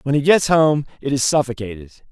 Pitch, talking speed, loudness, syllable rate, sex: 135 Hz, 200 wpm, -17 LUFS, 5.9 syllables/s, male